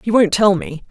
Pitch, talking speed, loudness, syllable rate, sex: 200 Hz, 265 wpm, -15 LUFS, 5.2 syllables/s, female